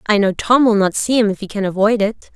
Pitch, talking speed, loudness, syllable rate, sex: 210 Hz, 305 wpm, -16 LUFS, 6.3 syllables/s, female